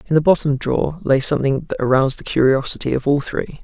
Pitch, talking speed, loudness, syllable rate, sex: 140 Hz, 215 wpm, -18 LUFS, 6.5 syllables/s, male